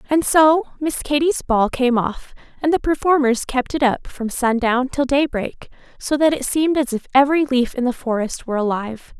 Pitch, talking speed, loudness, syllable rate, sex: 265 Hz, 195 wpm, -19 LUFS, 5.1 syllables/s, female